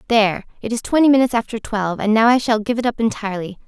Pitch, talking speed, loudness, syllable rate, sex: 225 Hz, 245 wpm, -18 LUFS, 7.4 syllables/s, female